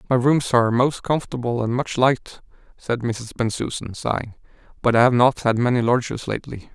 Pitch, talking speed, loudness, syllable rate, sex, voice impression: 120 Hz, 180 wpm, -21 LUFS, 5.6 syllables/s, male, masculine, adult-like, slightly thick, slightly dark, slightly fluent, slightly sincere, slightly calm, slightly modest